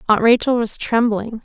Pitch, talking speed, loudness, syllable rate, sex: 225 Hz, 165 wpm, -17 LUFS, 4.8 syllables/s, female